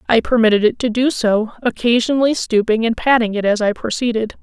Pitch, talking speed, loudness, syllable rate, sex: 230 Hz, 190 wpm, -16 LUFS, 5.8 syllables/s, female